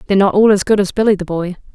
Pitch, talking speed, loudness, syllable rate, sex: 195 Hz, 310 wpm, -14 LUFS, 7.8 syllables/s, female